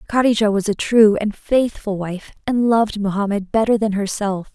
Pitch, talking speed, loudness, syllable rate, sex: 210 Hz, 170 wpm, -18 LUFS, 5.0 syllables/s, female